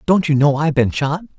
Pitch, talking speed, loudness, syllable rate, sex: 150 Hz, 260 wpm, -16 LUFS, 6.3 syllables/s, male